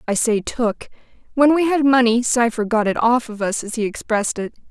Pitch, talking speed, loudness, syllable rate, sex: 235 Hz, 215 wpm, -18 LUFS, 5.4 syllables/s, female